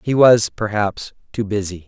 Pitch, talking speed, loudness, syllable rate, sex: 105 Hz, 160 wpm, -17 LUFS, 4.5 syllables/s, male